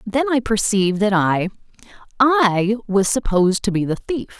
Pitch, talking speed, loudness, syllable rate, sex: 215 Hz, 150 wpm, -18 LUFS, 4.7 syllables/s, female